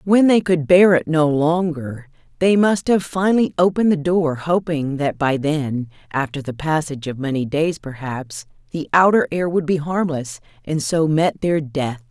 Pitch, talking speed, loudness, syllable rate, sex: 155 Hz, 180 wpm, -19 LUFS, 4.5 syllables/s, female